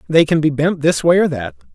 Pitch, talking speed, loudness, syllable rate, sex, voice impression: 145 Hz, 275 wpm, -15 LUFS, 5.7 syllables/s, male, masculine, adult-like, thick, tensed, powerful, bright, clear, fluent, cool, friendly, reassuring, wild, lively, slightly kind